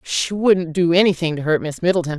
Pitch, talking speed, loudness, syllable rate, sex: 170 Hz, 220 wpm, -18 LUFS, 5.6 syllables/s, female